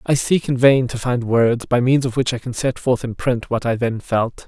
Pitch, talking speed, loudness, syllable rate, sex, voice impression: 125 Hz, 280 wpm, -19 LUFS, 4.8 syllables/s, male, very masculine, very adult-like, middle-aged, very thick, very tensed, powerful, slightly bright, hard, very clear, very fluent, very cool, very intellectual, slightly refreshing, very sincere, very calm, mature, very friendly, very reassuring, slightly unique, very elegant, sweet, slightly lively, slightly strict, slightly intense